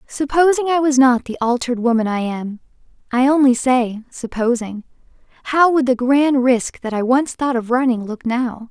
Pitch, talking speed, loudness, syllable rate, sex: 250 Hz, 165 wpm, -17 LUFS, 4.9 syllables/s, female